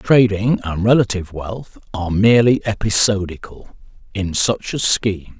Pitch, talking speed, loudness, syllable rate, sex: 100 Hz, 120 wpm, -17 LUFS, 4.7 syllables/s, male